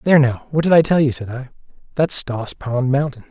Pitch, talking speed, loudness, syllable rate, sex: 135 Hz, 235 wpm, -18 LUFS, 5.7 syllables/s, male